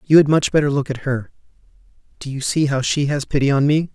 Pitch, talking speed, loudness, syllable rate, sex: 140 Hz, 230 wpm, -18 LUFS, 6.1 syllables/s, male